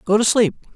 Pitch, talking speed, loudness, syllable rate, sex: 215 Hz, 235 wpm, -17 LUFS, 6.3 syllables/s, male